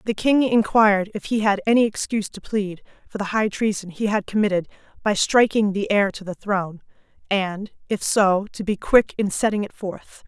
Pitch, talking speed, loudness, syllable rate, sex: 205 Hz, 200 wpm, -21 LUFS, 5.1 syllables/s, female